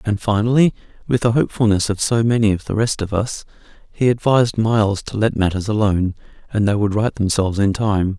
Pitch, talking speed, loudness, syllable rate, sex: 105 Hz, 200 wpm, -18 LUFS, 5.9 syllables/s, male